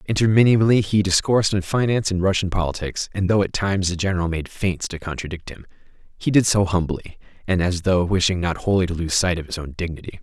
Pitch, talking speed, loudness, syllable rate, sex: 95 Hz, 210 wpm, -21 LUFS, 6.2 syllables/s, male